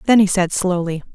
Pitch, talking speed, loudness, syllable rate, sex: 185 Hz, 210 wpm, -17 LUFS, 5.6 syllables/s, female